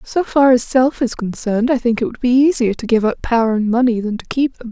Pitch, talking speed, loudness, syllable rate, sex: 240 Hz, 280 wpm, -16 LUFS, 5.9 syllables/s, female